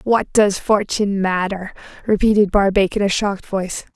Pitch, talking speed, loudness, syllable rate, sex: 200 Hz, 150 wpm, -18 LUFS, 5.3 syllables/s, female